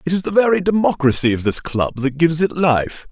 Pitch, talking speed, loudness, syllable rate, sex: 155 Hz, 230 wpm, -17 LUFS, 5.7 syllables/s, male